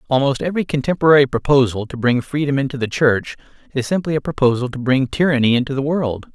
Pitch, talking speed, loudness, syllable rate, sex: 135 Hz, 190 wpm, -18 LUFS, 6.4 syllables/s, male